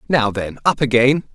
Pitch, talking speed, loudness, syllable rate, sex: 125 Hz, 180 wpm, -17 LUFS, 4.9 syllables/s, male